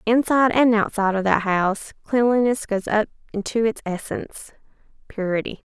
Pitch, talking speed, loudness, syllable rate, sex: 215 Hz, 135 wpm, -21 LUFS, 5.4 syllables/s, female